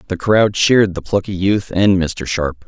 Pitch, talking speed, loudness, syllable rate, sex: 95 Hz, 200 wpm, -16 LUFS, 4.5 syllables/s, male